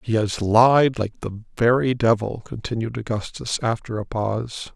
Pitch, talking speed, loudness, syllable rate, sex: 115 Hz, 150 wpm, -22 LUFS, 4.5 syllables/s, male